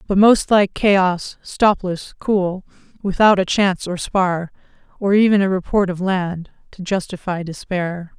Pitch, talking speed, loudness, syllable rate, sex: 190 Hz, 145 wpm, -18 LUFS, 4.1 syllables/s, female